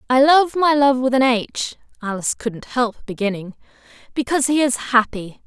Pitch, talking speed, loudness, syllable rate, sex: 250 Hz, 165 wpm, -18 LUFS, 5.0 syllables/s, female